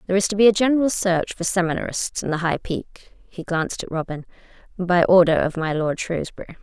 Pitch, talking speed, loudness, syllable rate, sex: 180 Hz, 210 wpm, -21 LUFS, 5.4 syllables/s, female